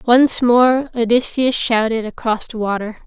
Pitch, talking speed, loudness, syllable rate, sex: 235 Hz, 135 wpm, -16 LUFS, 4.2 syllables/s, female